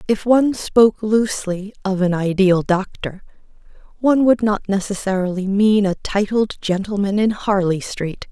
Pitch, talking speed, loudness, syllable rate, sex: 200 Hz, 135 wpm, -18 LUFS, 4.7 syllables/s, female